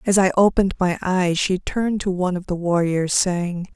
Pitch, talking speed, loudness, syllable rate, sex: 185 Hz, 210 wpm, -20 LUFS, 5.2 syllables/s, female